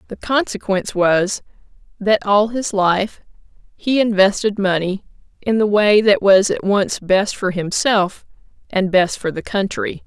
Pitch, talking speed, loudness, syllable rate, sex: 200 Hz, 150 wpm, -17 LUFS, 4.1 syllables/s, female